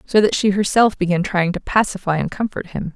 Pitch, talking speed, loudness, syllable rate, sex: 190 Hz, 225 wpm, -18 LUFS, 5.6 syllables/s, female